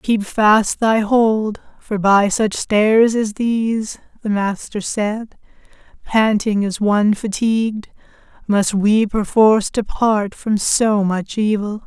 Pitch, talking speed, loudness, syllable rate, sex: 210 Hz, 125 wpm, -17 LUFS, 3.4 syllables/s, female